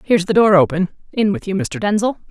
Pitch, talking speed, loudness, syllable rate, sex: 205 Hz, 210 wpm, -17 LUFS, 6.3 syllables/s, female